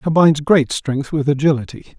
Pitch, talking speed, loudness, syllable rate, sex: 145 Hz, 150 wpm, -16 LUFS, 5.4 syllables/s, male